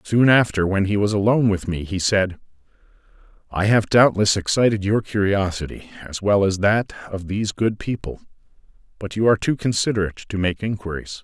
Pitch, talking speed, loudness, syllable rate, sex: 100 Hz, 170 wpm, -20 LUFS, 5.7 syllables/s, male